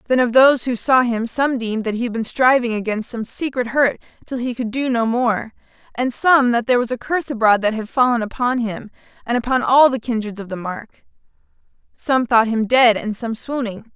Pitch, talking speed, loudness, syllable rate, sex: 235 Hz, 220 wpm, -18 LUFS, 5.4 syllables/s, female